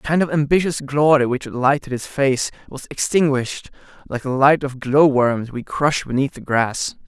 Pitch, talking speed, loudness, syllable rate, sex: 135 Hz, 195 wpm, -19 LUFS, 4.9 syllables/s, male